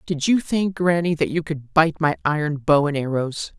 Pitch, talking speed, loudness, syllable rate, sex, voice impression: 155 Hz, 220 wpm, -21 LUFS, 4.8 syllables/s, male, very masculine, middle-aged, very thick, tensed, very powerful, bright, slightly hard, clear, slightly fluent, slightly raspy, cool, very intellectual, refreshing, sincere, calm, friendly, reassuring, slightly unique, slightly elegant, slightly wild, sweet, lively, slightly strict, slightly modest